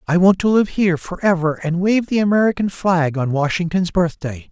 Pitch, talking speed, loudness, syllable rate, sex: 175 Hz, 200 wpm, -18 LUFS, 5.3 syllables/s, male